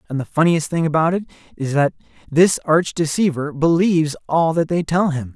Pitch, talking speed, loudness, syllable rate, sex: 160 Hz, 190 wpm, -18 LUFS, 5.3 syllables/s, male